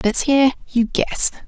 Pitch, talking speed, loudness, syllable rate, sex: 250 Hz, 160 wpm, -18 LUFS, 3.6 syllables/s, female